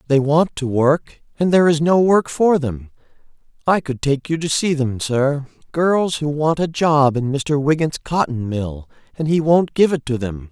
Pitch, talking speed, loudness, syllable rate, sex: 145 Hz, 200 wpm, -18 LUFS, 4.4 syllables/s, male